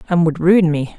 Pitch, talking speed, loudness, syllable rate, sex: 170 Hz, 245 wpm, -15 LUFS, 4.8 syllables/s, female